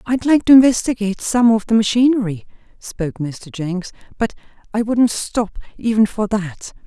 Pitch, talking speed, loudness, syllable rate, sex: 220 Hz, 155 wpm, -17 LUFS, 5.1 syllables/s, female